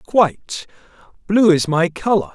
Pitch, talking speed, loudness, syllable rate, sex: 175 Hz, 100 wpm, -16 LUFS, 4.1 syllables/s, male